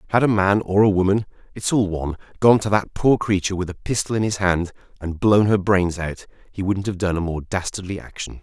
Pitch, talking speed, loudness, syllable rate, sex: 95 Hz, 220 wpm, -20 LUFS, 5.9 syllables/s, male